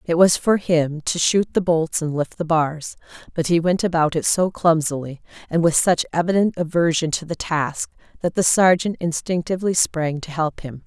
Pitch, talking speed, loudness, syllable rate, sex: 165 Hz, 195 wpm, -20 LUFS, 4.9 syllables/s, female